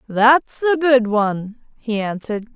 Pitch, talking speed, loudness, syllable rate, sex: 235 Hz, 140 wpm, -18 LUFS, 4.3 syllables/s, female